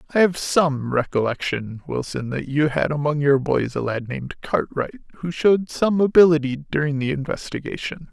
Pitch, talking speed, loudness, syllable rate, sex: 145 Hz, 165 wpm, -21 LUFS, 5.1 syllables/s, male